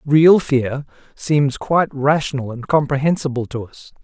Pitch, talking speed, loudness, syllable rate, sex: 140 Hz, 135 wpm, -17 LUFS, 4.5 syllables/s, male